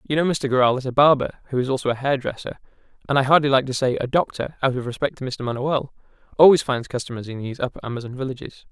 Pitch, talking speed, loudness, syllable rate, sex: 135 Hz, 220 wpm, -21 LUFS, 7.2 syllables/s, male